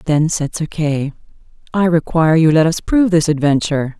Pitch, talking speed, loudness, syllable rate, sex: 160 Hz, 180 wpm, -15 LUFS, 5.6 syllables/s, female